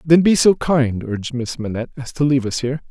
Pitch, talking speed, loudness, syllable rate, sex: 135 Hz, 250 wpm, -18 LUFS, 6.4 syllables/s, male